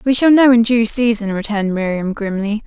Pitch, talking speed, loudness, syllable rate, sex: 220 Hz, 205 wpm, -15 LUFS, 5.5 syllables/s, female